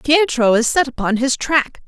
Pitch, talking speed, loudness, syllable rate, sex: 265 Hz, 190 wpm, -16 LUFS, 4.6 syllables/s, female